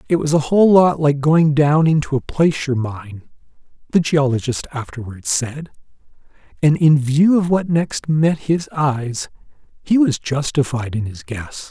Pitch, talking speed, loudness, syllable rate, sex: 145 Hz, 160 wpm, -17 LUFS, 4.3 syllables/s, male